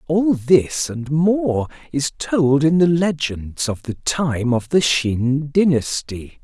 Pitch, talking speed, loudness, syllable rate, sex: 145 Hz, 150 wpm, -19 LUFS, 3.2 syllables/s, male